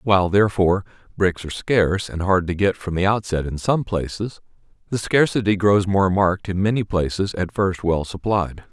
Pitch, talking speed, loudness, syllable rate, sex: 95 Hz, 185 wpm, -20 LUFS, 5.2 syllables/s, male